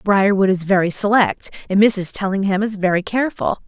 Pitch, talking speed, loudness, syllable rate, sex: 200 Hz, 165 wpm, -17 LUFS, 5.3 syllables/s, female